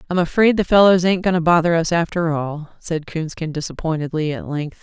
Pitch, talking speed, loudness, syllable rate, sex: 165 Hz, 200 wpm, -18 LUFS, 5.5 syllables/s, female